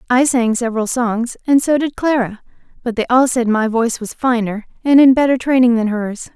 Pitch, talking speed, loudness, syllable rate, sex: 240 Hz, 210 wpm, -15 LUFS, 5.4 syllables/s, female